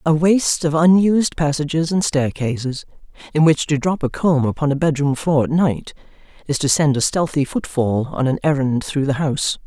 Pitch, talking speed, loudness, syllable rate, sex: 150 Hz, 190 wpm, -18 LUFS, 5.2 syllables/s, female